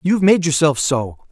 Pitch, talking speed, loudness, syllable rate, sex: 155 Hz, 180 wpm, -16 LUFS, 5.0 syllables/s, male